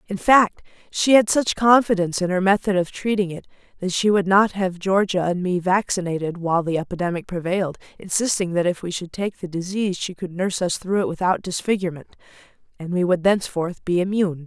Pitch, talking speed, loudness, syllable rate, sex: 185 Hz, 195 wpm, -21 LUFS, 5.9 syllables/s, female